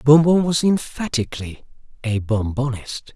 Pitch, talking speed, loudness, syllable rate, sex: 135 Hz, 115 wpm, -20 LUFS, 4.4 syllables/s, male